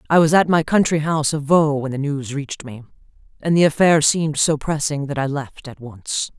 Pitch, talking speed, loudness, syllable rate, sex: 145 Hz, 225 wpm, -18 LUFS, 5.4 syllables/s, female